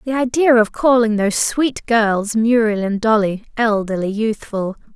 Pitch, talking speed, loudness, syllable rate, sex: 220 Hz, 145 wpm, -17 LUFS, 4.4 syllables/s, female